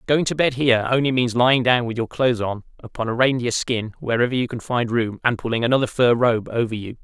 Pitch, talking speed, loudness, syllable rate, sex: 120 Hz, 240 wpm, -20 LUFS, 6.1 syllables/s, male